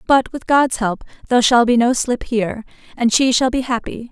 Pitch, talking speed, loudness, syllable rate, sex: 240 Hz, 220 wpm, -17 LUFS, 5.4 syllables/s, female